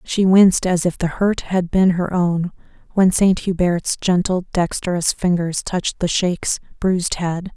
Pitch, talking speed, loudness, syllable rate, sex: 180 Hz, 165 wpm, -18 LUFS, 4.3 syllables/s, female